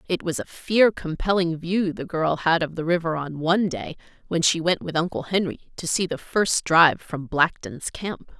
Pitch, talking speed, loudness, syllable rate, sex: 170 Hz, 205 wpm, -23 LUFS, 4.8 syllables/s, female